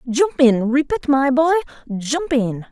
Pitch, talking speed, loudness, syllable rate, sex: 275 Hz, 155 wpm, -18 LUFS, 4.1 syllables/s, female